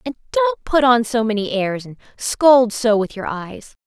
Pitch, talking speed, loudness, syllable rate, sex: 215 Hz, 200 wpm, -18 LUFS, 4.2 syllables/s, female